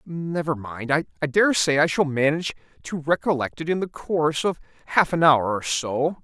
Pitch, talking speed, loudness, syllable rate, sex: 155 Hz, 190 wpm, -22 LUFS, 4.9 syllables/s, male